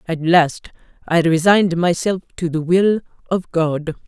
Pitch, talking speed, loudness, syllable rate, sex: 170 Hz, 145 wpm, -17 LUFS, 4.3 syllables/s, female